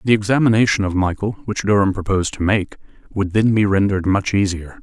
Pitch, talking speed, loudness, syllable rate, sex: 100 Hz, 175 wpm, -18 LUFS, 6.0 syllables/s, male